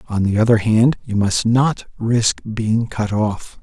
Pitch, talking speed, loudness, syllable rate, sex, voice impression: 110 Hz, 180 wpm, -18 LUFS, 3.7 syllables/s, male, masculine, adult-like, refreshing, slightly sincere, slightly elegant